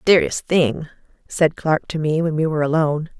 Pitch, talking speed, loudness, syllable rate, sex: 155 Hz, 190 wpm, -19 LUFS, 5.7 syllables/s, female